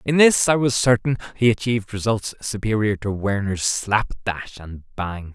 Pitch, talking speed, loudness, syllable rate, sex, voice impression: 110 Hz, 170 wpm, -21 LUFS, 4.6 syllables/s, male, very masculine, adult-like, middle-aged, thick, tensed, powerful, slightly dark, slightly hard, slightly muffled, fluent, cool, very intellectual, refreshing, very sincere, very calm, mature, friendly, very reassuring, unique, slightly elegant, very wild, sweet, lively, kind, intense